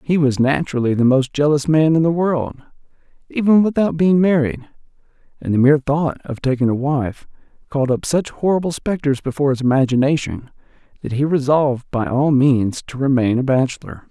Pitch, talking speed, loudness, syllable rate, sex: 140 Hz, 170 wpm, -17 LUFS, 5.6 syllables/s, male